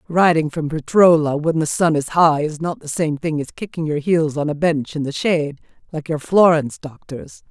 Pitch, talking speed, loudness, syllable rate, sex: 155 Hz, 215 wpm, -18 LUFS, 5.2 syllables/s, female